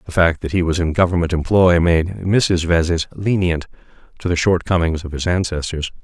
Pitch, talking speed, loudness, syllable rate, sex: 85 Hz, 180 wpm, -18 LUFS, 5.1 syllables/s, male